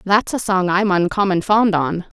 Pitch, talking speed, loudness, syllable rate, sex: 190 Hz, 190 wpm, -17 LUFS, 4.5 syllables/s, female